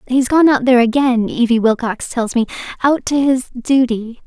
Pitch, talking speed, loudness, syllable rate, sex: 250 Hz, 170 wpm, -15 LUFS, 5.0 syllables/s, female